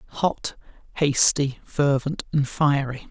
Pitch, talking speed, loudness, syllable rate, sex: 140 Hz, 95 wpm, -23 LUFS, 3.1 syllables/s, male